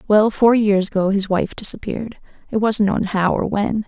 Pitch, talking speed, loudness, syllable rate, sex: 205 Hz, 185 wpm, -18 LUFS, 5.0 syllables/s, female